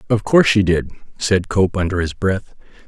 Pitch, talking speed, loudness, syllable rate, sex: 95 Hz, 190 wpm, -17 LUFS, 5.2 syllables/s, male